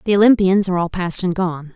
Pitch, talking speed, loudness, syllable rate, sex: 185 Hz, 240 wpm, -16 LUFS, 6.1 syllables/s, female